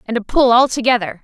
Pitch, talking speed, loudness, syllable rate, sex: 235 Hz, 240 wpm, -14 LUFS, 6.2 syllables/s, female